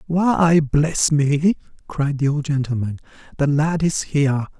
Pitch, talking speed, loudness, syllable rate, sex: 150 Hz, 145 wpm, -19 LUFS, 3.9 syllables/s, male